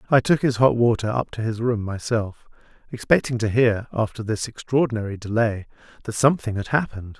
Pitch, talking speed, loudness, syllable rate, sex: 115 Hz, 175 wpm, -22 LUFS, 5.7 syllables/s, male